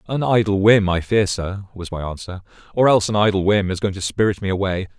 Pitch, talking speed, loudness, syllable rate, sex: 100 Hz, 240 wpm, -19 LUFS, 6.1 syllables/s, male